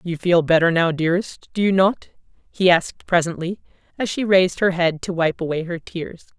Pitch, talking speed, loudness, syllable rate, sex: 175 Hz, 195 wpm, -20 LUFS, 5.3 syllables/s, female